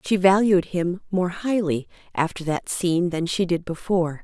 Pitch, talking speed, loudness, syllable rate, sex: 180 Hz, 170 wpm, -23 LUFS, 4.8 syllables/s, female